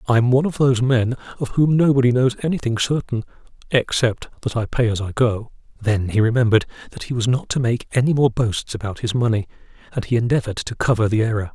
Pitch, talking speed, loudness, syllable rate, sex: 120 Hz, 210 wpm, -20 LUFS, 6.2 syllables/s, male